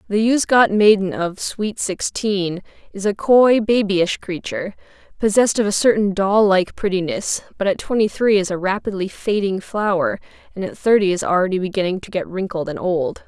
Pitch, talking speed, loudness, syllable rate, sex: 195 Hz, 170 wpm, -18 LUFS, 5.1 syllables/s, female